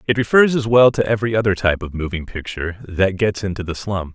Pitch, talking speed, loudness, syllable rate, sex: 100 Hz, 230 wpm, -18 LUFS, 6.4 syllables/s, male